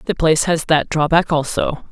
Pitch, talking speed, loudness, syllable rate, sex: 160 Hz, 190 wpm, -17 LUFS, 5.3 syllables/s, female